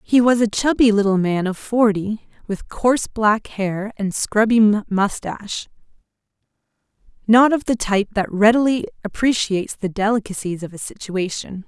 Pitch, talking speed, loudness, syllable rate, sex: 215 Hz, 140 wpm, -19 LUFS, 4.8 syllables/s, female